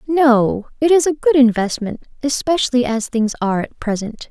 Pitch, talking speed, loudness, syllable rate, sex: 255 Hz, 165 wpm, -17 LUFS, 5.0 syllables/s, female